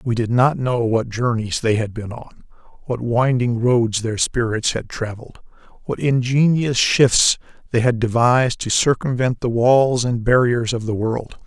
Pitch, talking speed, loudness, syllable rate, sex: 120 Hz, 170 wpm, -18 LUFS, 4.4 syllables/s, male